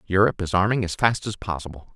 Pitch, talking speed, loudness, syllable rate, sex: 95 Hz, 215 wpm, -23 LUFS, 6.6 syllables/s, male